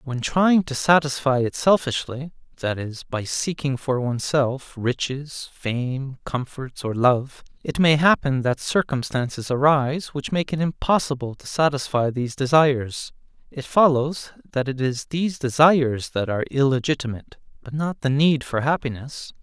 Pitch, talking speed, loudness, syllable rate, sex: 140 Hz, 140 wpm, -22 LUFS, 4.6 syllables/s, male